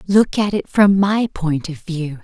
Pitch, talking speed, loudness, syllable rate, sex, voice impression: 180 Hz, 215 wpm, -17 LUFS, 3.9 syllables/s, female, very feminine, adult-like, thin, relaxed, slightly weak, slightly dark, very soft, muffled, fluent, slightly raspy, very cute, very intellectual, refreshing, sincere, calm, very friendly, very reassuring, very unique, very elegant, slightly wild, very sweet, slightly lively, very kind, modest, light